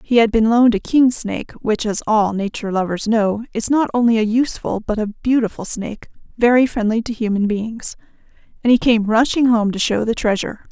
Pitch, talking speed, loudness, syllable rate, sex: 225 Hz, 200 wpm, -17 LUFS, 5.6 syllables/s, female